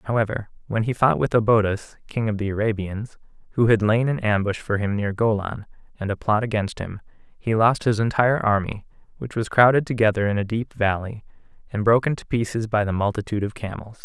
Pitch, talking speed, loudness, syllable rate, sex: 110 Hz, 195 wpm, -22 LUFS, 5.7 syllables/s, male